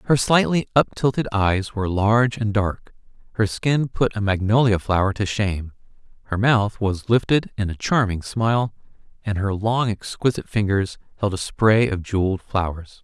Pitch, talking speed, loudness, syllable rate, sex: 105 Hz, 160 wpm, -21 LUFS, 4.9 syllables/s, male